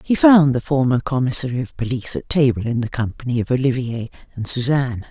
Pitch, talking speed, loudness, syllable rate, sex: 130 Hz, 190 wpm, -19 LUFS, 6.1 syllables/s, female